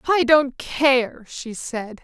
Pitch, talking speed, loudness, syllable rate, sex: 260 Hz, 145 wpm, -20 LUFS, 2.8 syllables/s, female